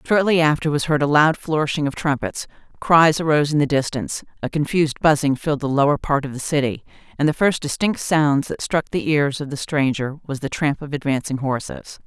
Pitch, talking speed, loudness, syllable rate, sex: 150 Hz, 210 wpm, -20 LUFS, 5.6 syllables/s, female